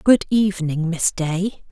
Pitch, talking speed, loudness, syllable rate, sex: 180 Hz, 140 wpm, -20 LUFS, 3.8 syllables/s, female